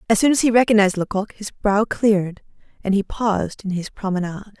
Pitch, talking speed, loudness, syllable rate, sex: 205 Hz, 195 wpm, -20 LUFS, 6.4 syllables/s, female